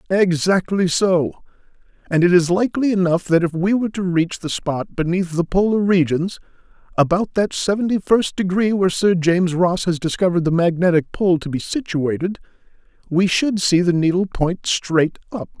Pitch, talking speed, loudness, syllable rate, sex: 180 Hz, 170 wpm, -18 LUFS, 5.1 syllables/s, male